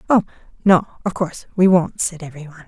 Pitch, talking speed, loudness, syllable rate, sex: 175 Hz, 180 wpm, -18 LUFS, 7.1 syllables/s, female